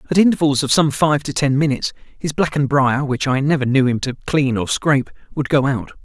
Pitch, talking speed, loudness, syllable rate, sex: 140 Hz, 230 wpm, -18 LUFS, 4.4 syllables/s, male